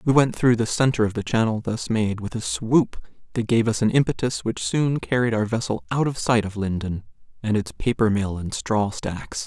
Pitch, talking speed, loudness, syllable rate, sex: 115 Hz, 220 wpm, -23 LUFS, 5.0 syllables/s, male